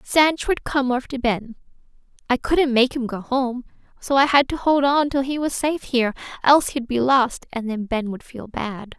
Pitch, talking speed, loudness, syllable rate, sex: 255 Hz, 215 wpm, -21 LUFS, 4.8 syllables/s, female